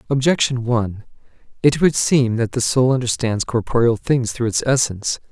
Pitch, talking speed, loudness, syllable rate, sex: 120 Hz, 160 wpm, -18 LUFS, 5.2 syllables/s, male